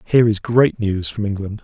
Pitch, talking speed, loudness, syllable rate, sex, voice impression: 105 Hz, 220 wpm, -18 LUFS, 5.2 syllables/s, male, very masculine, adult-like, slightly middle-aged, slightly thick, slightly relaxed, slightly weak, slightly dark, slightly soft, slightly muffled, slightly fluent, slightly cool, very intellectual, slightly refreshing, sincere, slightly calm, slightly mature, slightly friendly, slightly reassuring, slightly unique, slightly elegant, sweet, kind, modest